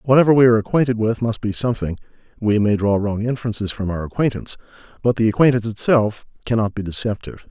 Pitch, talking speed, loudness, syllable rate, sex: 115 Hz, 185 wpm, -19 LUFS, 6.9 syllables/s, male